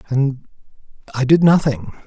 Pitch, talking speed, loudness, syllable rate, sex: 140 Hz, 115 wpm, -16 LUFS, 4.9 syllables/s, male